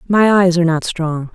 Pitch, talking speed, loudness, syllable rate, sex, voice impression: 175 Hz, 225 wpm, -15 LUFS, 5.1 syllables/s, female, feminine, adult-like, tensed, powerful, hard, clear, fluent, intellectual, lively, strict, intense, sharp